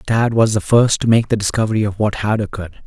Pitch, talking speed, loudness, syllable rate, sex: 110 Hz, 250 wpm, -16 LUFS, 6.5 syllables/s, male